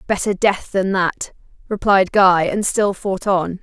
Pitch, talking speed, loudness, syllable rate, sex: 190 Hz, 165 wpm, -17 LUFS, 3.9 syllables/s, female